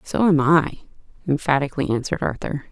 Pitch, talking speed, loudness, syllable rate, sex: 145 Hz, 130 wpm, -20 LUFS, 6.2 syllables/s, female